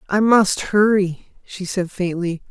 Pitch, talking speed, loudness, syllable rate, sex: 190 Hz, 145 wpm, -18 LUFS, 3.7 syllables/s, female